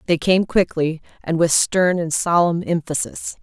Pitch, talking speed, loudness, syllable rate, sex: 170 Hz, 160 wpm, -19 LUFS, 4.4 syllables/s, female